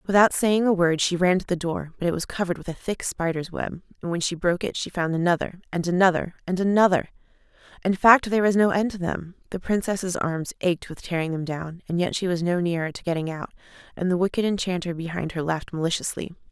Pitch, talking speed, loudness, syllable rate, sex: 180 Hz, 230 wpm, -24 LUFS, 6.1 syllables/s, female